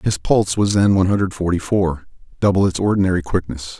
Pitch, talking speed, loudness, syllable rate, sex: 95 Hz, 190 wpm, -18 LUFS, 6.2 syllables/s, male